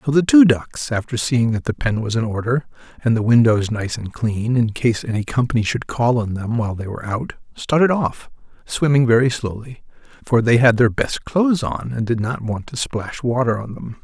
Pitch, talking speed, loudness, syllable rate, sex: 120 Hz, 220 wpm, -19 LUFS, 5.1 syllables/s, male